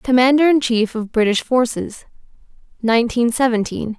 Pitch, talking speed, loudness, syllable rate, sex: 240 Hz, 120 wpm, -17 LUFS, 5.0 syllables/s, female